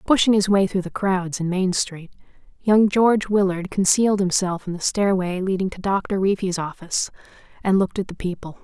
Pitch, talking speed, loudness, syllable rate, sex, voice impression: 190 Hz, 190 wpm, -21 LUFS, 5.5 syllables/s, female, very feminine, slightly young, adult-like, thin, slightly relaxed, slightly weak, slightly bright, very hard, very clear, fluent, cute, intellectual, refreshing, very sincere, very calm, friendly, very reassuring, unique, elegant, very sweet, slightly lively, kind, slightly strict, slightly intense, slightly sharp, light